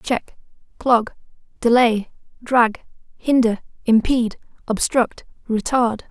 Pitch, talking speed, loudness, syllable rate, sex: 235 Hz, 80 wpm, -19 LUFS, 3.8 syllables/s, female